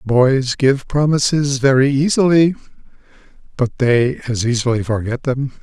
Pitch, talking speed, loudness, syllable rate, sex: 130 Hz, 115 wpm, -16 LUFS, 4.4 syllables/s, male